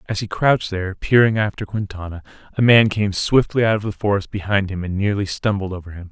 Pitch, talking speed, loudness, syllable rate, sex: 100 Hz, 215 wpm, -19 LUFS, 6.0 syllables/s, male